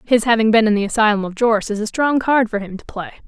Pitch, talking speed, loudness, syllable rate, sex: 220 Hz, 295 wpm, -17 LUFS, 6.6 syllables/s, female